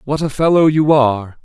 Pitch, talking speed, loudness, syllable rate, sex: 140 Hz, 210 wpm, -14 LUFS, 5.4 syllables/s, male